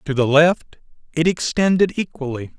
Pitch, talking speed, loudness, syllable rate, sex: 155 Hz, 140 wpm, -18 LUFS, 4.8 syllables/s, male